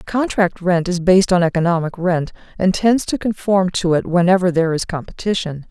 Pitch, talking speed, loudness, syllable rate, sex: 180 Hz, 180 wpm, -17 LUFS, 5.4 syllables/s, female